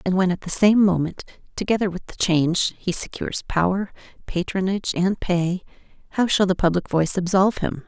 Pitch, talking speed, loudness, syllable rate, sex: 185 Hz, 175 wpm, -22 LUFS, 5.7 syllables/s, female